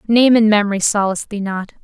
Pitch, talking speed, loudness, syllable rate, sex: 210 Hz, 195 wpm, -15 LUFS, 6.4 syllables/s, female